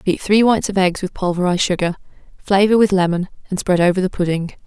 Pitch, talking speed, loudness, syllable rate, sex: 185 Hz, 205 wpm, -17 LUFS, 6.4 syllables/s, female